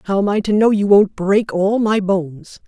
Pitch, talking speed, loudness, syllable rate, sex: 200 Hz, 245 wpm, -16 LUFS, 4.8 syllables/s, female